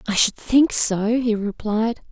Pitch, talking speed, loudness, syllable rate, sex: 225 Hz, 170 wpm, -19 LUFS, 3.8 syllables/s, female